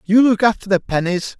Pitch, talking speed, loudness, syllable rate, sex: 205 Hz, 215 wpm, -17 LUFS, 5.4 syllables/s, male